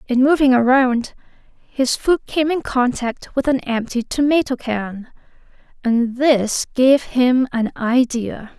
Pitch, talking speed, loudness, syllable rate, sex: 255 Hz, 135 wpm, -18 LUFS, 3.6 syllables/s, female